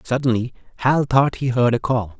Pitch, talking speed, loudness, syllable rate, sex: 125 Hz, 190 wpm, -19 LUFS, 5.1 syllables/s, male